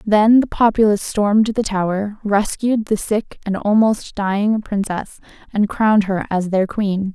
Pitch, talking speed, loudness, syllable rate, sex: 205 Hz, 160 wpm, -18 LUFS, 4.4 syllables/s, female